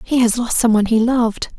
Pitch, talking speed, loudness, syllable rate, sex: 235 Hz, 225 wpm, -16 LUFS, 6.3 syllables/s, female